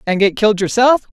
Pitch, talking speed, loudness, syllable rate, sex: 215 Hz, 210 wpm, -14 LUFS, 6.6 syllables/s, female